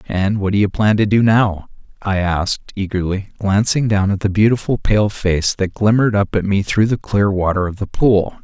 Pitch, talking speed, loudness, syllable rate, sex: 100 Hz, 215 wpm, -16 LUFS, 5.0 syllables/s, male